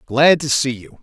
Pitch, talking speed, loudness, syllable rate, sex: 135 Hz, 235 wpm, -16 LUFS, 4.4 syllables/s, male